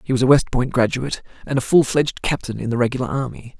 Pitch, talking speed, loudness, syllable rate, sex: 125 Hz, 250 wpm, -20 LUFS, 6.8 syllables/s, male